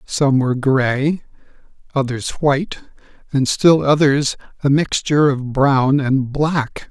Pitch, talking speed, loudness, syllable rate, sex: 140 Hz, 120 wpm, -17 LUFS, 3.8 syllables/s, male